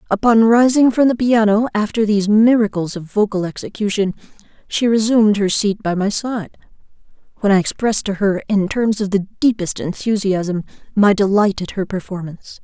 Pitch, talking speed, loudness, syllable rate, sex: 205 Hz, 160 wpm, -17 LUFS, 5.3 syllables/s, female